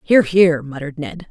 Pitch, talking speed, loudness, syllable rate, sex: 160 Hz, 185 wpm, -16 LUFS, 5.0 syllables/s, female